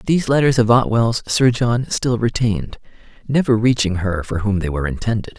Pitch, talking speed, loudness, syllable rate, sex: 110 Hz, 180 wpm, -18 LUFS, 5.5 syllables/s, male